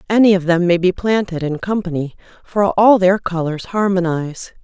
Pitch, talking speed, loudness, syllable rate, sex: 185 Hz, 170 wpm, -16 LUFS, 5.1 syllables/s, female